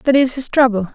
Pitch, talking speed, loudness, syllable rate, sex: 250 Hz, 255 wpm, -15 LUFS, 6.1 syllables/s, female